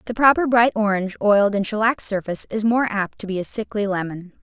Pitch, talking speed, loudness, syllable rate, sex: 210 Hz, 215 wpm, -20 LUFS, 6.3 syllables/s, female